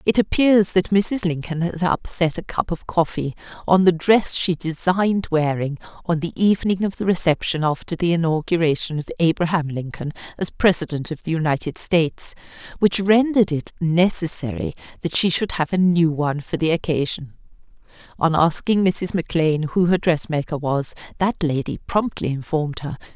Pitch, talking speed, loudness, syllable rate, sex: 170 Hz, 165 wpm, -20 LUFS, 5.2 syllables/s, female